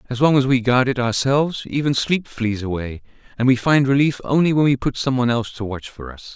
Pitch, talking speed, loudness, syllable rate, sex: 125 Hz, 245 wpm, -19 LUFS, 5.8 syllables/s, male